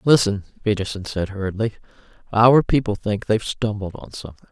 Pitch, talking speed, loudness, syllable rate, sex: 105 Hz, 145 wpm, -21 LUFS, 5.9 syllables/s, female